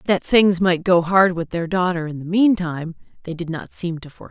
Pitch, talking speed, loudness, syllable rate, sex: 175 Hz, 235 wpm, -19 LUFS, 5.6 syllables/s, female